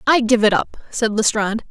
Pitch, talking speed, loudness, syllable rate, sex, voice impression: 220 Hz, 210 wpm, -17 LUFS, 5.6 syllables/s, female, very feminine, very adult-like, middle-aged, very thin, very tensed, slightly powerful, very bright, very hard, very clear, very fluent, slightly cool, slightly intellectual, refreshing, slightly sincere, very unique, slightly elegant, very lively, very strict, very intense, very sharp, light